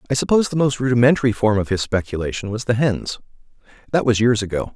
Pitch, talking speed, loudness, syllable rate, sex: 115 Hz, 200 wpm, -19 LUFS, 6.8 syllables/s, male